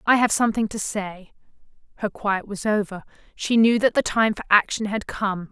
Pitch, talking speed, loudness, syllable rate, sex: 210 Hz, 195 wpm, -22 LUFS, 5.1 syllables/s, female